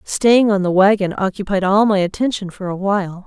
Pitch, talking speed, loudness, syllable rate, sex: 195 Hz, 200 wpm, -16 LUFS, 5.4 syllables/s, female